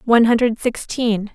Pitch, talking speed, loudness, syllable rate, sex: 230 Hz, 135 wpm, -18 LUFS, 5.0 syllables/s, female